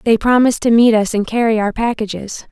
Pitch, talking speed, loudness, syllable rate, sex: 225 Hz, 215 wpm, -14 LUFS, 6.0 syllables/s, female